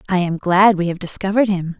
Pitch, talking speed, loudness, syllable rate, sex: 185 Hz, 235 wpm, -17 LUFS, 6.2 syllables/s, female